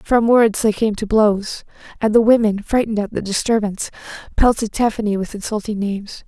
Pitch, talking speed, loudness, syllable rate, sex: 215 Hz, 170 wpm, -18 LUFS, 5.6 syllables/s, female